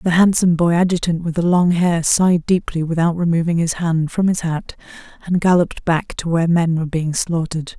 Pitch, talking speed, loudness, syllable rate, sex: 170 Hz, 200 wpm, -17 LUFS, 5.7 syllables/s, female